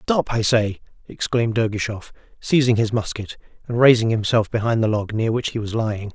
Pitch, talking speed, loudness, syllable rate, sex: 110 Hz, 185 wpm, -20 LUFS, 5.4 syllables/s, male